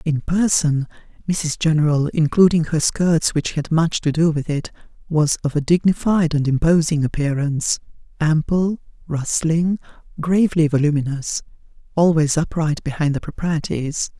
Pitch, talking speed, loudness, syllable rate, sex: 155 Hz, 125 wpm, -19 LUFS, 4.7 syllables/s, female